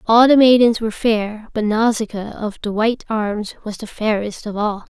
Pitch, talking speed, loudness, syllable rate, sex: 220 Hz, 195 wpm, -18 LUFS, 4.9 syllables/s, female